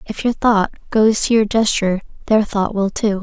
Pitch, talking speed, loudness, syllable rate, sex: 210 Hz, 205 wpm, -17 LUFS, 5.0 syllables/s, female